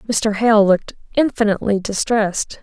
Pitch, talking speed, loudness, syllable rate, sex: 215 Hz, 115 wpm, -17 LUFS, 5.0 syllables/s, female